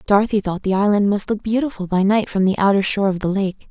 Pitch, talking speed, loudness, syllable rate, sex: 200 Hz, 260 wpm, -18 LUFS, 6.5 syllables/s, female